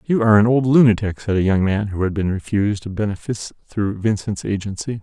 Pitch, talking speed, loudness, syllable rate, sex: 105 Hz, 215 wpm, -19 LUFS, 6.1 syllables/s, male